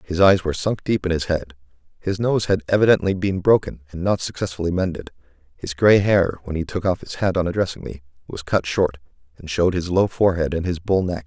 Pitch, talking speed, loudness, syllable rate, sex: 90 Hz, 225 wpm, -20 LUFS, 5.9 syllables/s, male